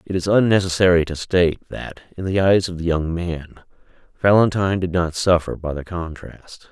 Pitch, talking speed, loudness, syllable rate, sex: 90 Hz, 180 wpm, -19 LUFS, 5.3 syllables/s, male